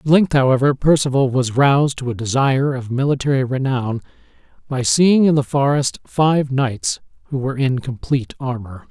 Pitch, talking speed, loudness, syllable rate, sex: 135 Hz, 160 wpm, -18 LUFS, 5.1 syllables/s, male